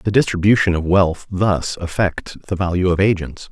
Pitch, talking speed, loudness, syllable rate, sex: 90 Hz, 170 wpm, -18 LUFS, 4.9 syllables/s, male